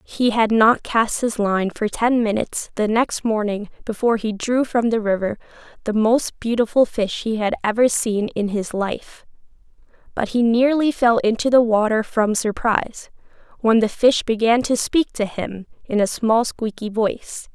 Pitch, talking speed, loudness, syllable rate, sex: 225 Hz, 175 wpm, -19 LUFS, 4.5 syllables/s, female